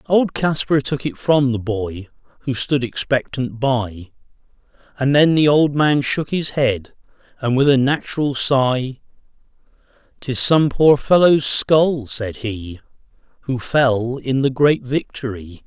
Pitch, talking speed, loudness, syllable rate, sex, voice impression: 130 Hz, 140 wpm, -18 LUFS, 3.8 syllables/s, male, masculine, middle-aged, tensed, powerful, bright, clear, slightly raspy, intellectual, mature, friendly, wild, lively, strict, slightly intense